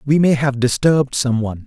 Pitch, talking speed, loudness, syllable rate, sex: 130 Hz, 215 wpm, -16 LUFS, 5.8 syllables/s, male